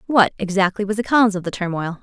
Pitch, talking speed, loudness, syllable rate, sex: 200 Hz, 235 wpm, -19 LUFS, 6.7 syllables/s, female